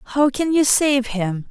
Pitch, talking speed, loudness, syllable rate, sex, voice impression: 260 Hz, 200 wpm, -18 LUFS, 3.5 syllables/s, female, feminine, slightly gender-neutral, adult-like, slightly middle-aged, thin, slightly tensed, slightly powerful, slightly bright, hard, clear, slightly fluent, slightly cute, slightly cool, intellectual, refreshing, sincere, very calm, reassuring, very unique, elegant, very kind, very modest